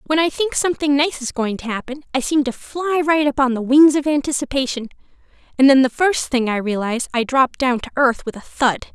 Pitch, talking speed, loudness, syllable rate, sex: 270 Hz, 235 wpm, -18 LUFS, 5.7 syllables/s, female